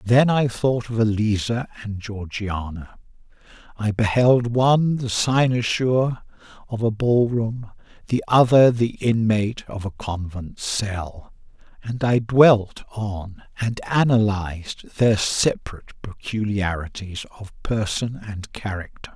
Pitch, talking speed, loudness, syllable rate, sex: 110 Hz, 115 wpm, -21 LUFS, 3.9 syllables/s, male